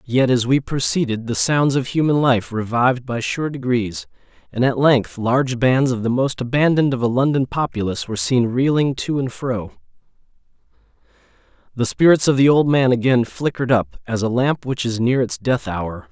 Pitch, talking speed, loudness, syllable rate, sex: 130 Hz, 185 wpm, -18 LUFS, 5.2 syllables/s, male